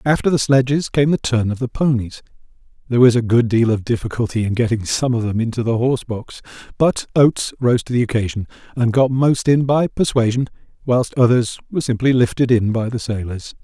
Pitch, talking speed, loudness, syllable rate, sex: 120 Hz, 200 wpm, -18 LUFS, 5.7 syllables/s, male